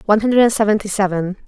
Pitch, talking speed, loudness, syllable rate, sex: 205 Hz, 160 wpm, -16 LUFS, 7.1 syllables/s, female